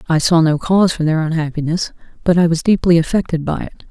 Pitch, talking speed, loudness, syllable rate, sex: 165 Hz, 215 wpm, -16 LUFS, 6.2 syllables/s, female